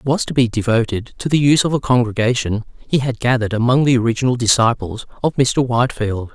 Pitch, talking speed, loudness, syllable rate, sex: 120 Hz, 200 wpm, -17 LUFS, 6.3 syllables/s, male